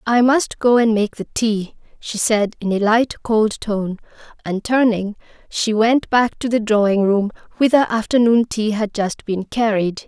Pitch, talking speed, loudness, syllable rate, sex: 220 Hz, 180 wpm, -18 LUFS, 4.2 syllables/s, female